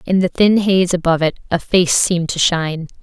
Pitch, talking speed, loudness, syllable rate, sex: 175 Hz, 220 wpm, -15 LUFS, 5.6 syllables/s, female